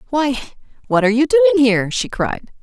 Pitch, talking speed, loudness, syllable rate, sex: 235 Hz, 185 wpm, -16 LUFS, 5.8 syllables/s, female